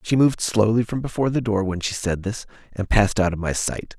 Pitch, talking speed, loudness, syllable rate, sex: 105 Hz, 255 wpm, -22 LUFS, 6.1 syllables/s, male